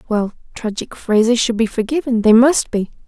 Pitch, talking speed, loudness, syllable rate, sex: 230 Hz, 175 wpm, -16 LUFS, 5.1 syllables/s, female